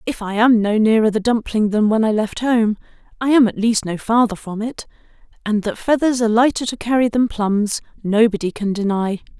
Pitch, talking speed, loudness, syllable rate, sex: 220 Hz, 205 wpm, -18 LUFS, 5.3 syllables/s, female